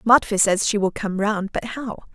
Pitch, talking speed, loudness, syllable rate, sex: 210 Hz, 225 wpm, -21 LUFS, 4.7 syllables/s, female